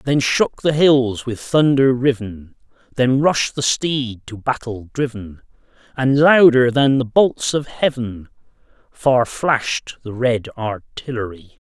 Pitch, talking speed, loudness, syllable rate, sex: 125 Hz, 135 wpm, -18 LUFS, 3.6 syllables/s, male